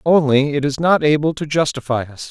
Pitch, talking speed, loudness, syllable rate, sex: 145 Hz, 210 wpm, -17 LUFS, 5.4 syllables/s, male